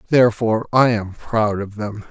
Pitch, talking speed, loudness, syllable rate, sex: 110 Hz, 170 wpm, -19 LUFS, 5.0 syllables/s, male